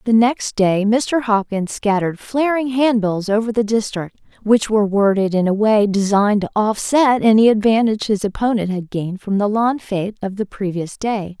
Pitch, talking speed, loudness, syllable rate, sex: 215 Hz, 185 wpm, -17 LUFS, 5.1 syllables/s, female